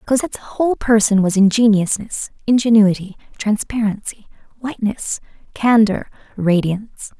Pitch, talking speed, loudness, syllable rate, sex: 215 Hz, 85 wpm, -17 LUFS, 4.9 syllables/s, female